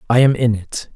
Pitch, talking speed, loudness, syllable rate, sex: 120 Hz, 250 wpm, -16 LUFS, 5.3 syllables/s, male